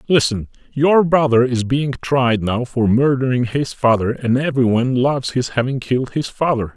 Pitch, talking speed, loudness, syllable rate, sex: 130 Hz, 180 wpm, -17 LUFS, 5.1 syllables/s, male